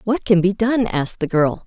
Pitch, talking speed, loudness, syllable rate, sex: 195 Hz, 250 wpm, -18 LUFS, 5.2 syllables/s, female